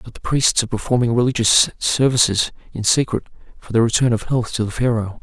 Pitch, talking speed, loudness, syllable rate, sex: 115 Hz, 195 wpm, -18 LUFS, 5.9 syllables/s, male